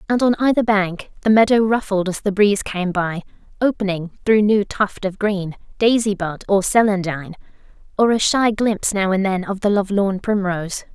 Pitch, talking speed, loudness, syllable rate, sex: 200 Hz, 185 wpm, -18 LUFS, 5.0 syllables/s, female